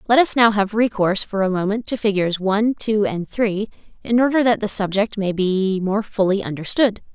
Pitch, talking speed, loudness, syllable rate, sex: 205 Hz, 200 wpm, -19 LUFS, 5.1 syllables/s, female